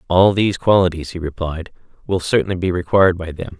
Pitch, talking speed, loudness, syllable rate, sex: 90 Hz, 185 wpm, -18 LUFS, 6.2 syllables/s, male